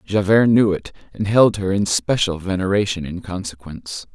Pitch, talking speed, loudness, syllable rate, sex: 95 Hz, 160 wpm, -19 LUFS, 5.0 syllables/s, male